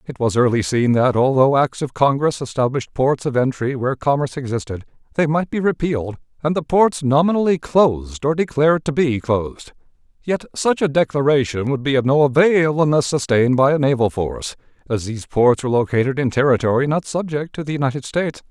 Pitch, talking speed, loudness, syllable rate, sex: 140 Hz, 190 wpm, -18 LUFS, 5.9 syllables/s, male